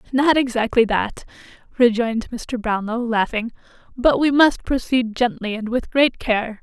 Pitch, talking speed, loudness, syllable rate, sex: 235 Hz, 145 wpm, -19 LUFS, 4.5 syllables/s, female